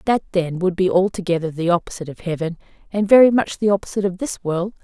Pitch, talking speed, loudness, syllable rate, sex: 185 Hz, 210 wpm, -19 LUFS, 6.7 syllables/s, female